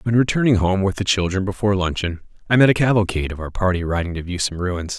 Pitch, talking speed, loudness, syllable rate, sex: 95 Hz, 240 wpm, -20 LUFS, 6.7 syllables/s, male